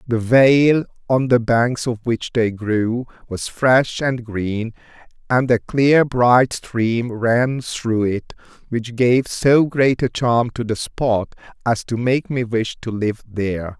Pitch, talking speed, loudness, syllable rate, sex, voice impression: 120 Hz, 165 wpm, -18 LUFS, 3.3 syllables/s, male, very masculine, adult-like, middle-aged, slightly thick, tensed, slightly powerful, bright, slightly soft, clear, fluent, cool, intellectual, slightly refreshing, very sincere, calm, slightly mature, friendly, slightly reassuring, slightly unique, elegant, slightly wild, lively, kind, modest, slightly light